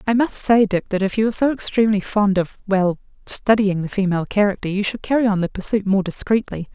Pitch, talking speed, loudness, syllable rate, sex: 205 Hz, 205 wpm, -19 LUFS, 6.2 syllables/s, female